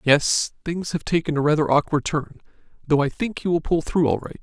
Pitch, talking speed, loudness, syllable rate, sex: 155 Hz, 230 wpm, -22 LUFS, 5.4 syllables/s, male